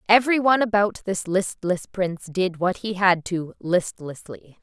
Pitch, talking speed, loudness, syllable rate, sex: 190 Hz, 155 wpm, -22 LUFS, 4.6 syllables/s, female